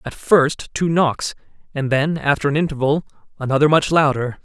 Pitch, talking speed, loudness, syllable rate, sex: 145 Hz, 160 wpm, -18 LUFS, 5.1 syllables/s, male